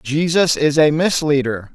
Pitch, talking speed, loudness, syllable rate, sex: 150 Hz, 135 wpm, -16 LUFS, 4.1 syllables/s, male